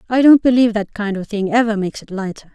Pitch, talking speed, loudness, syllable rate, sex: 215 Hz, 260 wpm, -16 LUFS, 6.8 syllables/s, female